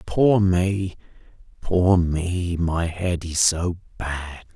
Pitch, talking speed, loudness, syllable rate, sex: 90 Hz, 120 wpm, -22 LUFS, 2.6 syllables/s, male